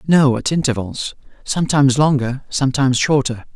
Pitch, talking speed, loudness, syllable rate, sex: 135 Hz, 120 wpm, -17 LUFS, 5.6 syllables/s, male